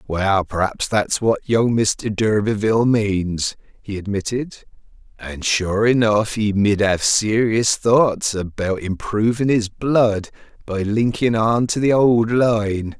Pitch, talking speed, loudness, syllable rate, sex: 110 Hz, 135 wpm, -18 LUFS, 3.5 syllables/s, male